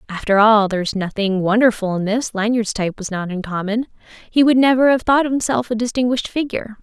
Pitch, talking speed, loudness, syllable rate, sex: 220 Hz, 195 wpm, -18 LUFS, 6.2 syllables/s, female